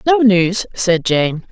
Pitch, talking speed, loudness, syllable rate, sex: 195 Hz, 160 wpm, -15 LUFS, 3.1 syllables/s, female